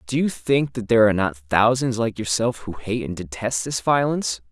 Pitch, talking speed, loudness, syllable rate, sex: 115 Hz, 215 wpm, -21 LUFS, 5.4 syllables/s, male